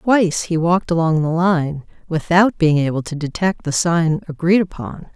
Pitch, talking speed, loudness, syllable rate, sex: 170 Hz, 175 wpm, -18 LUFS, 4.8 syllables/s, female